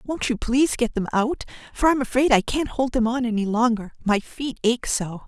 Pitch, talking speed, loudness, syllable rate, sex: 240 Hz, 230 wpm, -22 LUFS, 5.2 syllables/s, female